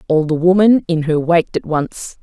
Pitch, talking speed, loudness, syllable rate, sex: 165 Hz, 215 wpm, -15 LUFS, 5.0 syllables/s, female